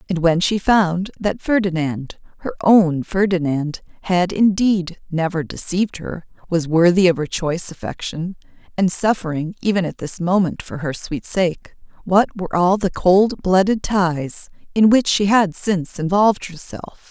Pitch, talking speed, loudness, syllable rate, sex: 180 Hz, 155 wpm, -18 LUFS, 4.4 syllables/s, female